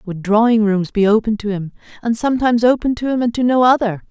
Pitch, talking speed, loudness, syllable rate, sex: 225 Hz, 235 wpm, -16 LUFS, 6.8 syllables/s, female